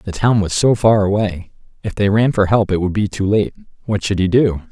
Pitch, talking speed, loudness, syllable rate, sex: 100 Hz, 240 wpm, -16 LUFS, 5.3 syllables/s, male